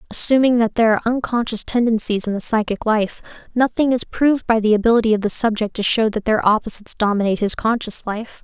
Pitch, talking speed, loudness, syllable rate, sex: 225 Hz, 200 wpm, -18 LUFS, 6.4 syllables/s, female